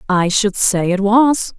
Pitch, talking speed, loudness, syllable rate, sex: 205 Hz, 190 wpm, -14 LUFS, 3.6 syllables/s, female